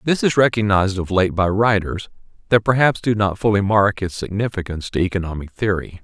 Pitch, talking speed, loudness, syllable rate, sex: 100 Hz, 180 wpm, -19 LUFS, 5.8 syllables/s, male